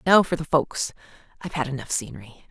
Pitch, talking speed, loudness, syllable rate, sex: 145 Hz, 170 wpm, -24 LUFS, 6.4 syllables/s, female